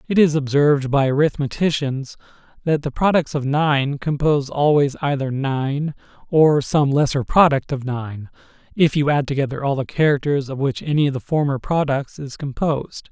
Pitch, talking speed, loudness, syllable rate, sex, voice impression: 145 Hz, 165 wpm, -19 LUFS, 5.0 syllables/s, male, masculine, very adult-like, middle-aged, slightly thick, slightly tensed, slightly weak, bright, slightly soft, clear, slightly fluent, slightly cool, very intellectual, refreshing, very sincere, slightly calm, slightly friendly, slightly reassuring, very unique, slightly wild, lively, slightly kind, slightly modest